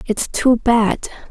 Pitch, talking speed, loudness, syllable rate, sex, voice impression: 230 Hz, 140 wpm, -17 LUFS, 3.0 syllables/s, female, feminine, slightly adult-like, soft, cute, slightly calm, friendly, kind